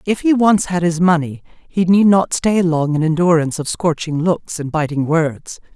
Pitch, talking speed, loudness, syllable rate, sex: 170 Hz, 200 wpm, -16 LUFS, 4.7 syllables/s, female